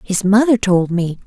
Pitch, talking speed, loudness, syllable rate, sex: 200 Hz, 190 wpm, -15 LUFS, 4.5 syllables/s, female